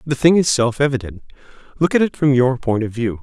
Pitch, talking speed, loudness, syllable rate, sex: 130 Hz, 240 wpm, -17 LUFS, 5.8 syllables/s, male